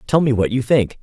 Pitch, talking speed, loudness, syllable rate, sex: 120 Hz, 290 wpm, -17 LUFS, 5.7 syllables/s, female